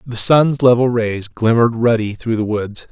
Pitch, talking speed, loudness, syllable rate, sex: 115 Hz, 185 wpm, -15 LUFS, 4.6 syllables/s, male